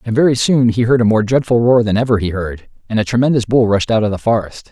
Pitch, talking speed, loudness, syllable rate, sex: 115 Hz, 280 wpm, -14 LUFS, 6.3 syllables/s, male